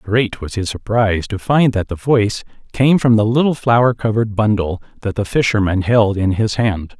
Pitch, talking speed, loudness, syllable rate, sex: 110 Hz, 195 wpm, -16 LUFS, 5.0 syllables/s, male